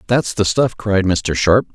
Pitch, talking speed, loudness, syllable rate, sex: 100 Hz, 205 wpm, -16 LUFS, 4.1 syllables/s, male